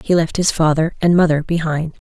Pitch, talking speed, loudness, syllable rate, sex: 160 Hz, 205 wpm, -16 LUFS, 5.6 syllables/s, female